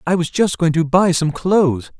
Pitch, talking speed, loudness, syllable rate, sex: 165 Hz, 240 wpm, -16 LUFS, 4.9 syllables/s, male